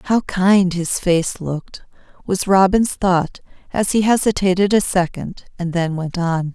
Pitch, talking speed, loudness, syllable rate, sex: 185 Hz, 155 wpm, -18 LUFS, 4.2 syllables/s, female